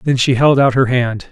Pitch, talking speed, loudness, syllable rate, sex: 130 Hz, 275 wpm, -13 LUFS, 5.0 syllables/s, male